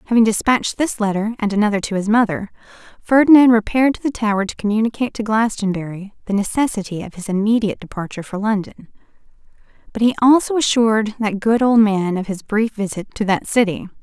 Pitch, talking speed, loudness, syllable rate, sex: 215 Hz, 175 wpm, -18 LUFS, 6.3 syllables/s, female